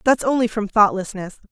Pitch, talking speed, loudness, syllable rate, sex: 215 Hz, 160 wpm, -19 LUFS, 5.5 syllables/s, female